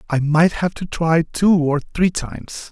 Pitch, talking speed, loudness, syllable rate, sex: 165 Hz, 200 wpm, -18 LUFS, 4.0 syllables/s, male